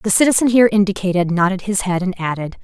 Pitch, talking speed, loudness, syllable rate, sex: 195 Hz, 205 wpm, -16 LUFS, 6.6 syllables/s, female